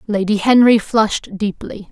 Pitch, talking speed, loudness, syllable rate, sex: 210 Hz, 125 wpm, -15 LUFS, 4.7 syllables/s, female